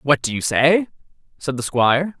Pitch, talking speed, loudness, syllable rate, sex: 145 Hz, 190 wpm, -18 LUFS, 4.9 syllables/s, male